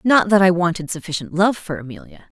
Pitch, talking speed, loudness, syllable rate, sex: 170 Hz, 200 wpm, -18 LUFS, 5.8 syllables/s, female